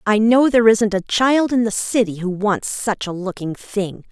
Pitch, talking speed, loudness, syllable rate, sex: 215 Hz, 220 wpm, -18 LUFS, 4.5 syllables/s, female